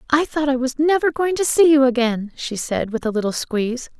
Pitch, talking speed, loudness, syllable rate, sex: 270 Hz, 240 wpm, -19 LUFS, 5.5 syllables/s, female